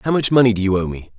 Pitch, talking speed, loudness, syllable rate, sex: 110 Hz, 355 wpm, -16 LUFS, 7.3 syllables/s, male